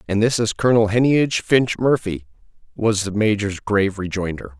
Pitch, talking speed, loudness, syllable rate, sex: 105 Hz, 155 wpm, -19 LUFS, 5.5 syllables/s, male